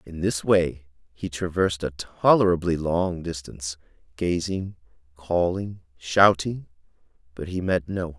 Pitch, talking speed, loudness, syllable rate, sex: 85 Hz, 125 wpm, -24 LUFS, 4.5 syllables/s, male